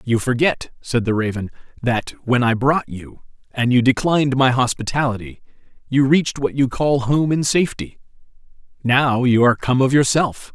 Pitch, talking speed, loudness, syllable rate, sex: 125 Hz, 165 wpm, -18 LUFS, 5.0 syllables/s, male